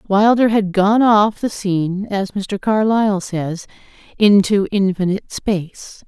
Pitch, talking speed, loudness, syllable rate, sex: 200 Hz, 130 wpm, -16 LUFS, 4.0 syllables/s, female